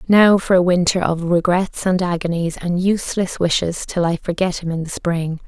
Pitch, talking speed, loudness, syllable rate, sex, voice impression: 175 Hz, 195 wpm, -18 LUFS, 4.9 syllables/s, female, very feminine, slightly adult-like, slightly thin, tensed, slightly weak, slightly bright, slightly soft, clear, fluent, cute, intellectual, slightly refreshing, sincere, very calm, friendly, very reassuring, unique, very elegant, wild, sweet, lively, kind, slightly modest, slightly light